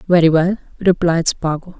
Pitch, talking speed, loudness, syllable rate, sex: 170 Hz, 135 wpm, -16 LUFS, 5.0 syllables/s, female